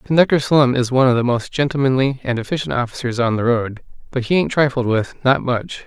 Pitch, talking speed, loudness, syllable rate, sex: 130 Hz, 215 wpm, -18 LUFS, 6.0 syllables/s, male